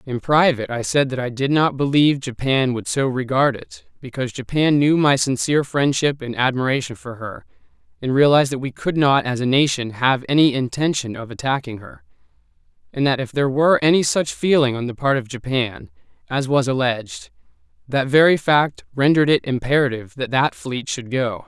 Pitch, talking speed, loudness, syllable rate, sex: 135 Hz, 185 wpm, -19 LUFS, 5.5 syllables/s, male